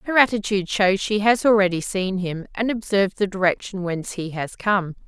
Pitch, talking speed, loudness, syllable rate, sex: 195 Hz, 190 wpm, -21 LUFS, 5.5 syllables/s, female